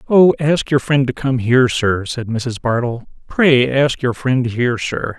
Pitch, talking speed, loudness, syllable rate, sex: 130 Hz, 195 wpm, -16 LUFS, 4.2 syllables/s, male